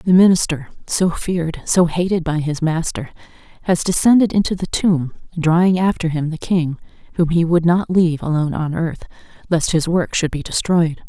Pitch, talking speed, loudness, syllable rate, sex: 165 Hz, 180 wpm, -18 LUFS, 5.1 syllables/s, female